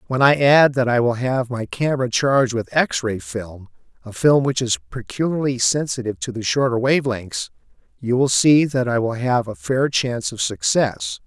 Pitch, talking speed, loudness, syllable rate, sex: 125 Hz, 195 wpm, -19 LUFS, 4.9 syllables/s, male